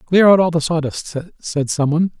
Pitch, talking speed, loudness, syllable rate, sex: 160 Hz, 220 wpm, -17 LUFS, 4.9 syllables/s, male